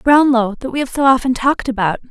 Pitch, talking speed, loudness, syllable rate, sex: 250 Hz, 230 wpm, -15 LUFS, 6.3 syllables/s, female